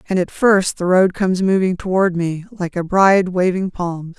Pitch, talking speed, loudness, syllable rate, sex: 185 Hz, 200 wpm, -17 LUFS, 4.8 syllables/s, female